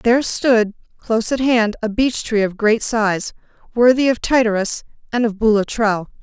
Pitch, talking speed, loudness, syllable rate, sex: 225 Hz, 165 wpm, -17 LUFS, 4.9 syllables/s, female